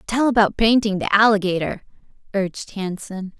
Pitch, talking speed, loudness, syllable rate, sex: 205 Hz, 125 wpm, -19 LUFS, 5.1 syllables/s, female